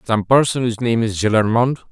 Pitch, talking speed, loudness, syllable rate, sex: 115 Hz, 190 wpm, -17 LUFS, 6.6 syllables/s, male